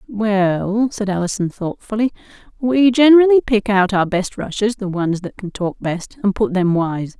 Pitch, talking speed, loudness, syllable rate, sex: 205 Hz, 175 wpm, -17 LUFS, 4.5 syllables/s, female